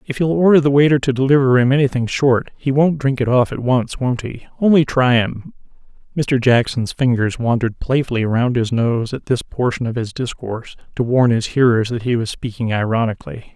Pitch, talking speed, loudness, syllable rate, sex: 125 Hz, 195 wpm, -17 LUFS, 5.4 syllables/s, male